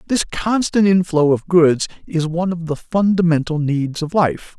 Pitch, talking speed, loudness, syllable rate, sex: 170 Hz, 170 wpm, -17 LUFS, 4.5 syllables/s, male